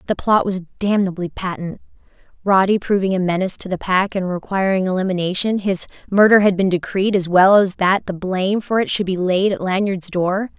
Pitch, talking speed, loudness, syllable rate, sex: 190 Hz, 195 wpm, -18 LUFS, 5.4 syllables/s, female